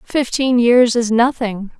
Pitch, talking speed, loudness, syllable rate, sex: 235 Hz, 135 wpm, -15 LUFS, 3.6 syllables/s, female